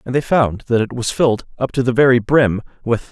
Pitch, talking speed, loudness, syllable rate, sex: 120 Hz, 250 wpm, -17 LUFS, 5.6 syllables/s, male